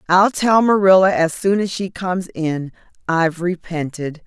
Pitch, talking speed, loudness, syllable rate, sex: 180 Hz, 155 wpm, -17 LUFS, 4.6 syllables/s, female